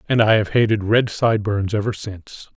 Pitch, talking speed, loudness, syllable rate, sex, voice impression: 105 Hz, 185 wpm, -19 LUFS, 5.5 syllables/s, male, very masculine, very adult-like, very middle-aged, very thick, tensed, very powerful, bright, slightly hard, clear, fluent, slightly raspy, very cool, intellectual, very sincere, very calm, very mature, friendly, very reassuring, unique, elegant, wild, sweet, slightly lively, kind